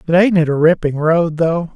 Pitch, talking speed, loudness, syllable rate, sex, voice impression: 165 Hz, 240 wpm, -14 LUFS, 5.0 syllables/s, male, masculine, adult-like, slightly middle-aged, slightly thin, relaxed, weak, slightly dark, slightly hard, slightly muffled, slightly halting, slightly raspy, slightly cool, very intellectual, sincere, calm, slightly mature, slightly friendly, reassuring, elegant, slightly sweet, very kind, very modest